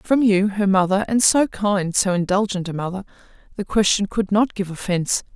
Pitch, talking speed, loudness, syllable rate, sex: 200 Hz, 190 wpm, -20 LUFS, 5.2 syllables/s, female